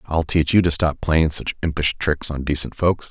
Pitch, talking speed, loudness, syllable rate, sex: 80 Hz, 230 wpm, -20 LUFS, 4.8 syllables/s, male